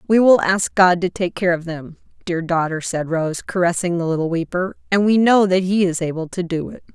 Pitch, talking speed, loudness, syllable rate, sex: 180 Hz, 235 wpm, -18 LUFS, 5.4 syllables/s, female